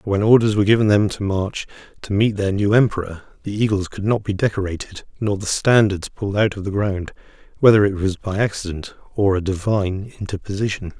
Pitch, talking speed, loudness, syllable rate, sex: 100 Hz, 195 wpm, -19 LUFS, 5.9 syllables/s, male